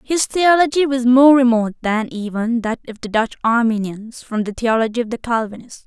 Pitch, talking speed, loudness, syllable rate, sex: 235 Hz, 185 wpm, -17 LUFS, 5.2 syllables/s, female